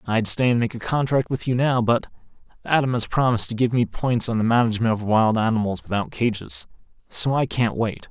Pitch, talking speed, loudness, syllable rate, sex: 115 Hz, 215 wpm, -21 LUFS, 5.7 syllables/s, male